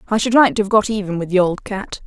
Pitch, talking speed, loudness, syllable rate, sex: 205 Hz, 320 wpm, -17 LUFS, 6.4 syllables/s, female